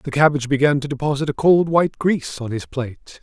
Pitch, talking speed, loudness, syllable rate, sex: 145 Hz, 225 wpm, -19 LUFS, 6.3 syllables/s, male